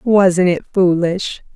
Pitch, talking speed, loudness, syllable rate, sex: 185 Hz, 115 wpm, -15 LUFS, 3.1 syllables/s, female